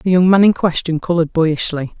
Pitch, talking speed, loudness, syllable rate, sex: 170 Hz, 210 wpm, -15 LUFS, 5.7 syllables/s, female